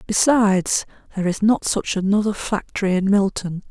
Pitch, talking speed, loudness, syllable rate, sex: 200 Hz, 145 wpm, -20 LUFS, 5.3 syllables/s, female